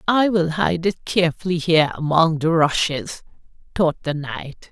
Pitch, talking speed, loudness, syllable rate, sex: 165 Hz, 155 wpm, -20 LUFS, 4.6 syllables/s, female